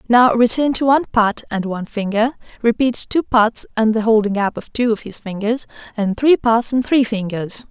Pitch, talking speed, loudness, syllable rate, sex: 225 Hz, 200 wpm, -17 LUFS, 5.0 syllables/s, female